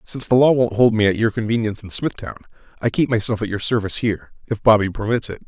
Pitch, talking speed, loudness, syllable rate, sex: 110 Hz, 230 wpm, -19 LUFS, 7.0 syllables/s, male